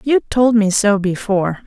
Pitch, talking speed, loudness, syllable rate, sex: 210 Hz, 180 wpm, -15 LUFS, 4.7 syllables/s, female